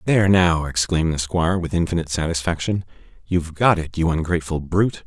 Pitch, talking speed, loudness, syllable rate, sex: 85 Hz, 165 wpm, -21 LUFS, 6.4 syllables/s, male